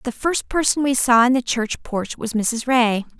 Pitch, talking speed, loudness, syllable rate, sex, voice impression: 245 Hz, 225 wpm, -19 LUFS, 4.4 syllables/s, female, feminine, adult-like, slightly clear, slightly cute, slightly refreshing, friendly, slightly lively